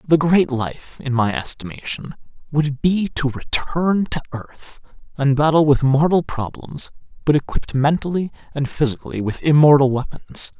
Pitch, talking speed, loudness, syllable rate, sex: 145 Hz, 140 wpm, -19 LUFS, 4.6 syllables/s, male